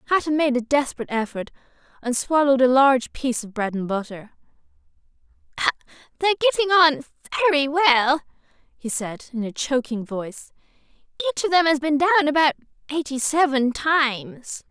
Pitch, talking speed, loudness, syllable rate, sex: 275 Hz, 145 wpm, -21 LUFS, 5.8 syllables/s, female